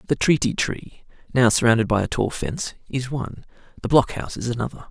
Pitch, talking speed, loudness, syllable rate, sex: 120 Hz, 195 wpm, -22 LUFS, 6.2 syllables/s, male